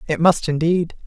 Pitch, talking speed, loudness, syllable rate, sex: 165 Hz, 170 wpm, -19 LUFS, 4.8 syllables/s, female